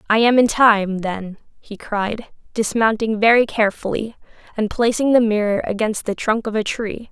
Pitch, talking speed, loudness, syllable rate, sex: 220 Hz, 170 wpm, -18 LUFS, 4.8 syllables/s, female